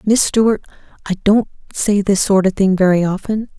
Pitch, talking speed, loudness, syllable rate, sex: 200 Hz, 185 wpm, -15 LUFS, 5.1 syllables/s, female